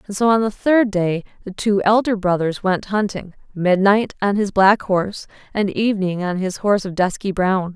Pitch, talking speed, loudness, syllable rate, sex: 195 Hz, 185 wpm, -18 LUFS, 5.0 syllables/s, female